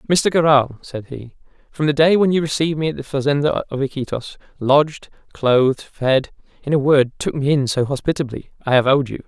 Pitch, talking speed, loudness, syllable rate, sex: 140 Hz, 190 wpm, -18 LUFS, 5.6 syllables/s, male